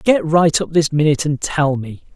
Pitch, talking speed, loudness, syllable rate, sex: 150 Hz, 220 wpm, -16 LUFS, 5.1 syllables/s, male